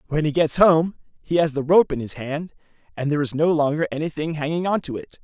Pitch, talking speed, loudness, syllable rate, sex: 155 Hz, 240 wpm, -21 LUFS, 6.1 syllables/s, male